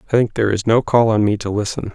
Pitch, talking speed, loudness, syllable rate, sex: 110 Hz, 310 wpm, -17 LUFS, 6.6 syllables/s, male